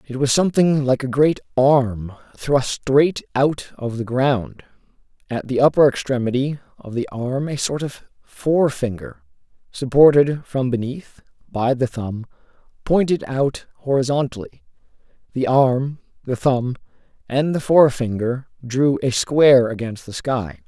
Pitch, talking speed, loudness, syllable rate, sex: 130 Hz, 135 wpm, -19 LUFS, 4.3 syllables/s, male